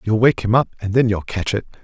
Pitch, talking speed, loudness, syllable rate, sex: 110 Hz, 295 wpm, -18 LUFS, 6.0 syllables/s, male